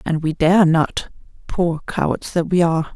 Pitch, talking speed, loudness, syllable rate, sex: 170 Hz, 185 wpm, -18 LUFS, 4.5 syllables/s, female